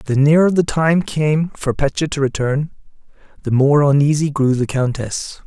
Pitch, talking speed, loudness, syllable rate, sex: 145 Hz, 165 wpm, -17 LUFS, 4.5 syllables/s, male